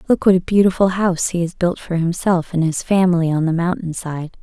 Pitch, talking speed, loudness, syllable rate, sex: 175 Hz, 230 wpm, -18 LUFS, 5.7 syllables/s, female